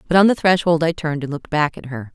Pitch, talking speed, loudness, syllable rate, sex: 155 Hz, 305 wpm, -18 LUFS, 7.0 syllables/s, female